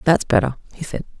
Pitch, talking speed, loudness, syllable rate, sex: 155 Hz, 200 wpm, -20 LUFS, 6.3 syllables/s, female